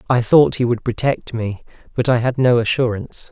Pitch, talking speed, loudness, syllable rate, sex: 120 Hz, 200 wpm, -17 LUFS, 5.4 syllables/s, male